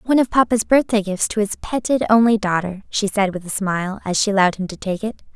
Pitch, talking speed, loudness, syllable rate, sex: 205 Hz, 245 wpm, -19 LUFS, 6.1 syllables/s, female